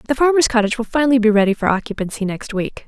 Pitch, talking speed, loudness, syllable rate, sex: 230 Hz, 230 wpm, -17 LUFS, 7.4 syllables/s, female